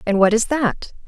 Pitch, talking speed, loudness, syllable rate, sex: 225 Hz, 225 wpm, -18 LUFS, 4.7 syllables/s, female